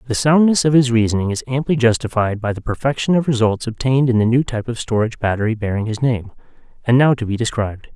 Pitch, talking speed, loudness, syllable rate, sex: 120 Hz, 220 wpm, -17 LUFS, 6.6 syllables/s, male